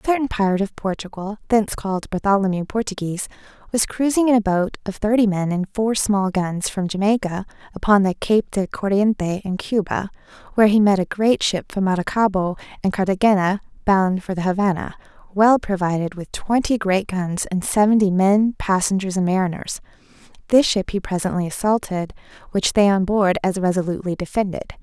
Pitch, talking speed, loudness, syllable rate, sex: 195 Hz, 165 wpm, -20 LUFS, 5.5 syllables/s, female